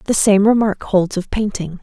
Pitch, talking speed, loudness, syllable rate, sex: 200 Hz, 195 wpm, -16 LUFS, 4.5 syllables/s, female